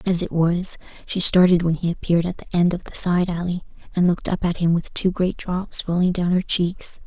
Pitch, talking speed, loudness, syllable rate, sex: 175 Hz, 240 wpm, -21 LUFS, 5.4 syllables/s, female